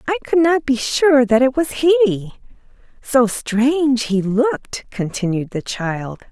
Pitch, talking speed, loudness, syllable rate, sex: 255 Hz, 140 wpm, -17 LUFS, 4.1 syllables/s, female